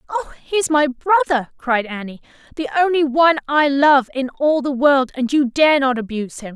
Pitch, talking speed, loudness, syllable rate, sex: 275 Hz, 200 wpm, -17 LUFS, 5.0 syllables/s, female